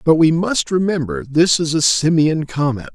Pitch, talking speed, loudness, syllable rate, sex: 155 Hz, 185 wpm, -16 LUFS, 4.6 syllables/s, male